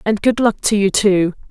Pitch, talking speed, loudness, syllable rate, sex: 205 Hz, 240 wpm, -15 LUFS, 4.7 syllables/s, female